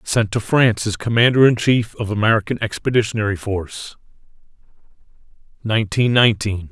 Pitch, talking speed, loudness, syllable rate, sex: 110 Hz, 115 wpm, -18 LUFS, 5.8 syllables/s, male